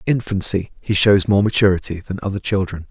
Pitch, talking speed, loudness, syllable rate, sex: 100 Hz, 185 wpm, -18 LUFS, 6.1 syllables/s, male